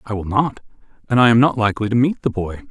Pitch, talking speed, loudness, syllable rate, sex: 110 Hz, 265 wpm, -17 LUFS, 6.7 syllables/s, male